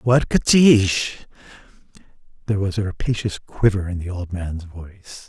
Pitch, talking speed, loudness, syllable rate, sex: 95 Hz, 135 wpm, -20 LUFS, 5.4 syllables/s, male